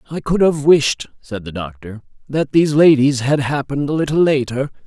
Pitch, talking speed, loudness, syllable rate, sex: 135 Hz, 185 wpm, -16 LUFS, 5.3 syllables/s, male